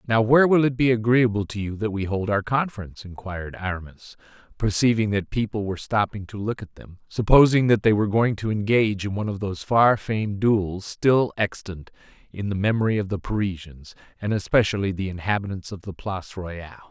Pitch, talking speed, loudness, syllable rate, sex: 105 Hz, 190 wpm, -23 LUFS, 5.8 syllables/s, male